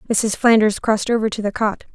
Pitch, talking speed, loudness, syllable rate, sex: 215 Hz, 215 wpm, -18 LUFS, 5.9 syllables/s, female